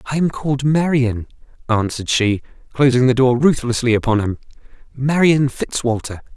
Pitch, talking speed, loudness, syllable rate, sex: 125 Hz, 125 wpm, -17 LUFS, 5.3 syllables/s, male